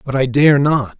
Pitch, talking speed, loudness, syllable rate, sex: 135 Hz, 240 wpm, -14 LUFS, 4.6 syllables/s, male